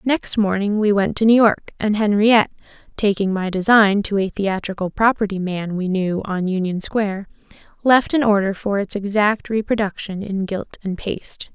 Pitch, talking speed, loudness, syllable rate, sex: 205 Hz, 170 wpm, -19 LUFS, 4.8 syllables/s, female